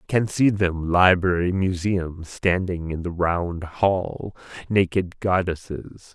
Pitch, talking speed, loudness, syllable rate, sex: 90 Hz, 115 wpm, -22 LUFS, 3.4 syllables/s, male